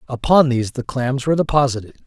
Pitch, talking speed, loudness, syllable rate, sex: 130 Hz, 175 wpm, -18 LUFS, 6.7 syllables/s, male